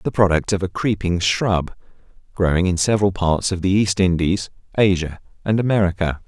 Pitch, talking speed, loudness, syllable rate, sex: 95 Hz, 165 wpm, -19 LUFS, 5.3 syllables/s, male